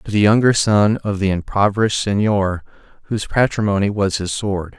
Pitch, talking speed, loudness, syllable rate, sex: 100 Hz, 165 wpm, -17 LUFS, 5.3 syllables/s, male